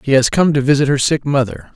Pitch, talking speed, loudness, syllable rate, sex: 140 Hz, 275 wpm, -15 LUFS, 6.1 syllables/s, male